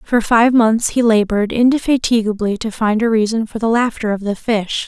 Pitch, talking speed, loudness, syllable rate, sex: 225 Hz, 195 wpm, -16 LUFS, 5.2 syllables/s, female